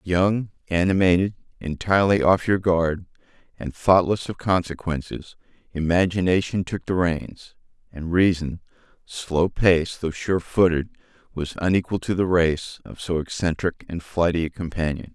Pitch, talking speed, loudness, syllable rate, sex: 90 Hz, 130 wpm, -22 LUFS, 4.6 syllables/s, male